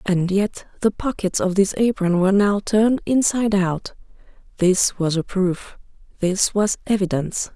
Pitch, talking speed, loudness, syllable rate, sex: 195 Hz, 150 wpm, -20 LUFS, 4.6 syllables/s, female